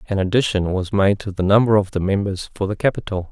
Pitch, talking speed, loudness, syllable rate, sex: 100 Hz, 235 wpm, -19 LUFS, 6.0 syllables/s, male